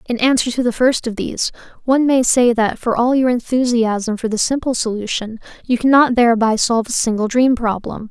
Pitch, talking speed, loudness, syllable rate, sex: 235 Hz, 200 wpm, -16 LUFS, 5.6 syllables/s, female